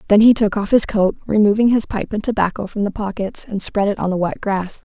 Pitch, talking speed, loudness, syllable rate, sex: 205 Hz, 255 wpm, -18 LUFS, 5.7 syllables/s, female